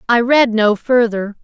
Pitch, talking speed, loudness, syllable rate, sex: 230 Hz, 165 wpm, -14 LUFS, 4.0 syllables/s, female